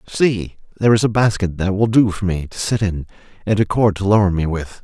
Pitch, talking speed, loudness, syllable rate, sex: 100 Hz, 250 wpm, -17 LUFS, 5.8 syllables/s, male